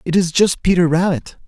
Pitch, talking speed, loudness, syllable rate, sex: 175 Hz, 205 wpm, -16 LUFS, 5.4 syllables/s, male